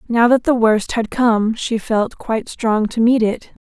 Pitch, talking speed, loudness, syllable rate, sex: 225 Hz, 215 wpm, -17 LUFS, 4.1 syllables/s, female